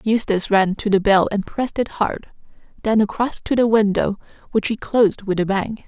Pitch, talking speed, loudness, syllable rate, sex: 210 Hz, 205 wpm, -19 LUFS, 5.4 syllables/s, female